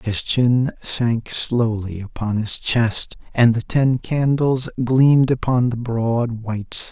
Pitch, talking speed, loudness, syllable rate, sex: 120 Hz, 150 wpm, -19 LUFS, 3.5 syllables/s, male